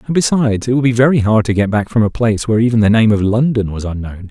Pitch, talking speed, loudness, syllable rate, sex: 110 Hz, 295 wpm, -14 LUFS, 7.0 syllables/s, male